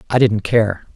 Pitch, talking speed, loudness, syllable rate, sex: 110 Hz, 250 wpm, -17 LUFS, 5.6 syllables/s, male